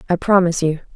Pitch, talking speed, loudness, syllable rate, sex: 175 Hz, 190 wpm, -17 LUFS, 8.1 syllables/s, female